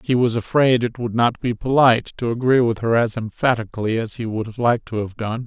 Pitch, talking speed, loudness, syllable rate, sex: 115 Hz, 230 wpm, -20 LUFS, 5.4 syllables/s, male